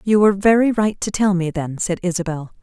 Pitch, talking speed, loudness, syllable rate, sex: 190 Hz, 230 wpm, -18 LUFS, 5.8 syllables/s, female